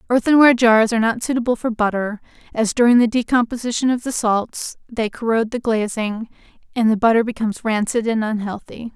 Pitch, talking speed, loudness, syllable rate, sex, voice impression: 230 Hz, 175 wpm, -18 LUFS, 5.7 syllables/s, female, feminine, adult-like, slightly powerful, hard, clear, intellectual, calm, lively, intense, sharp